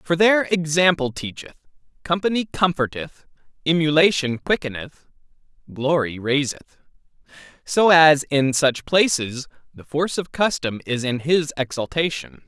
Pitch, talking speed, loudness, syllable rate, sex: 150 Hz, 110 wpm, -20 LUFS, 4.6 syllables/s, male